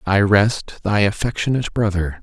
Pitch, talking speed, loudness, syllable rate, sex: 100 Hz, 135 wpm, -19 LUFS, 5.0 syllables/s, male